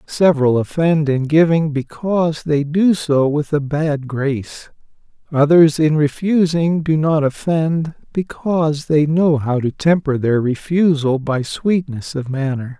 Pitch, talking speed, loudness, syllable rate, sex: 150 Hz, 140 wpm, -17 LUFS, 4.1 syllables/s, male